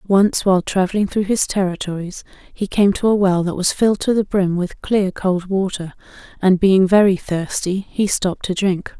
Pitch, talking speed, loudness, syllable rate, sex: 190 Hz, 195 wpm, -18 LUFS, 4.9 syllables/s, female